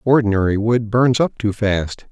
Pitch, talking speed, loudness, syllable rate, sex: 110 Hz, 170 wpm, -17 LUFS, 4.5 syllables/s, male